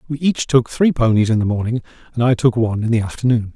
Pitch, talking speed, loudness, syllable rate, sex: 120 Hz, 255 wpm, -17 LUFS, 6.5 syllables/s, male